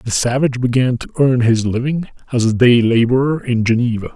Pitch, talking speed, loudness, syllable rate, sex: 125 Hz, 190 wpm, -15 LUFS, 5.8 syllables/s, male